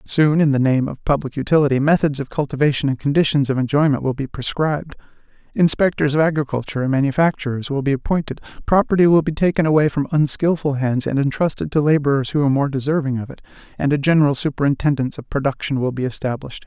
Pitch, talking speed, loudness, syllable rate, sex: 145 Hz, 185 wpm, -19 LUFS, 6.7 syllables/s, male